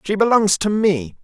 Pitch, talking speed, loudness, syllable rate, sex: 195 Hz, 195 wpm, -17 LUFS, 4.6 syllables/s, male